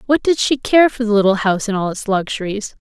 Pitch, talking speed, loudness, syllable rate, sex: 220 Hz, 255 wpm, -16 LUFS, 6.1 syllables/s, female